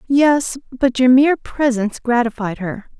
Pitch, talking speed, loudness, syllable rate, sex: 250 Hz, 140 wpm, -17 LUFS, 4.6 syllables/s, female